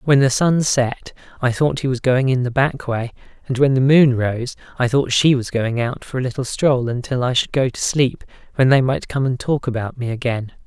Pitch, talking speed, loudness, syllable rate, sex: 130 Hz, 240 wpm, -18 LUFS, 5.1 syllables/s, male